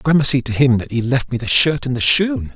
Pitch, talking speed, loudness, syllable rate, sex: 130 Hz, 280 wpm, -16 LUFS, 5.7 syllables/s, male